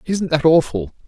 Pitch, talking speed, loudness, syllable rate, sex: 150 Hz, 170 wpm, -17 LUFS, 4.8 syllables/s, male